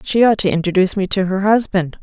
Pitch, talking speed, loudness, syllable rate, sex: 195 Hz, 235 wpm, -16 LUFS, 6.3 syllables/s, female